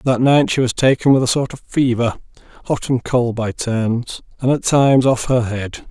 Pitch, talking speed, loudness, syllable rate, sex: 125 Hz, 215 wpm, -17 LUFS, 4.7 syllables/s, male